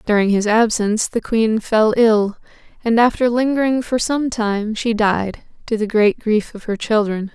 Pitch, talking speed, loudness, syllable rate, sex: 220 Hz, 180 wpm, -17 LUFS, 4.4 syllables/s, female